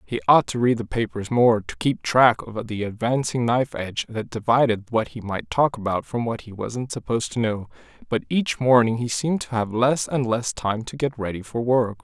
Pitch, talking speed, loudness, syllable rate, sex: 120 Hz, 225 wpm, -23 LUFS, 5.2 syllables/s, male